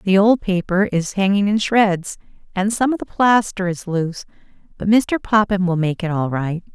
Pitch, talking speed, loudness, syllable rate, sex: 195 Hz, 195 wpm, -18 LUFS, 4.8 syllables/s, female